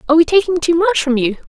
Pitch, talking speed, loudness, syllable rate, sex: 320 Hz, 280 wpm, -14 LUFS, 7.4 syllables/s, female